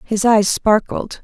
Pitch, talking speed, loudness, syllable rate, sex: 215 Hz, 145 wpm, -16 LUFS, 3.5 syllables/s, female